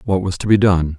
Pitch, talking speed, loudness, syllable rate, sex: 95 Hz, 305 wpm, -16 LUFS, 5.8 syllables/s, male